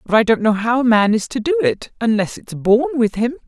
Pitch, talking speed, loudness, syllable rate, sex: 235 Hz, 275 wpm, -17 LUFS, 5.3 syllables/s, female